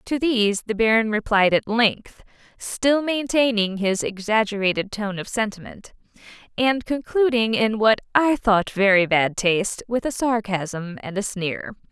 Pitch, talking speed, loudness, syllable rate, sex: 220 Hz, 145 wpm, -21 LUFS, 3.2 syllables/s, female